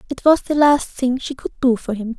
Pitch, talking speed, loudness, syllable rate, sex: 260 Hz, 275 wpm, -18 LUFS, 5.3 syllables/s, female